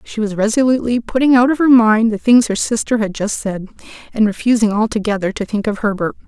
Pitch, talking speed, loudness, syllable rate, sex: 220 Hz, 210 wpm, -15 LUFS, 6.0 syllables/s, female